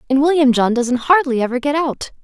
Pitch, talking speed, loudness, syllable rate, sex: 270 Hz, 215 wpm, -16 LUFS, 5.6 syllables/s, female